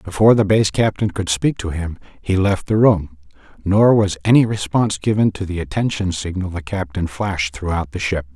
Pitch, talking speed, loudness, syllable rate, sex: 95 Hz, 195 wpm, -18 LUFS, 5.3 syllables/s, male